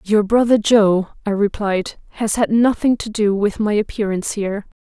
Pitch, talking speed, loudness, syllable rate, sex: 210 Hz, 175 wpm, -18 LUFS, 4.9 syllables/s, female